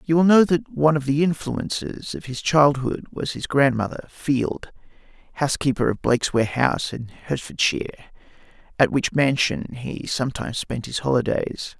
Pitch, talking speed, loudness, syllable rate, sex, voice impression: 140 Hz, 145 wpm, -22 LUFS, 5.2 syllables/s, male, masculine, adult-like, slightly muffled, fluent, slightly sincere, calm, reassuring